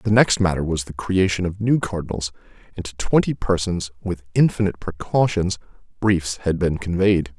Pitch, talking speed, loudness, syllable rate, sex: 90 Hz, 165 wpm, -21 LUFS, 5.1 syllables/s, male